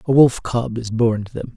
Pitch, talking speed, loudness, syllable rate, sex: 115 Hz, 270 wpm, -19 LUFS, 4.9 syllables/s, male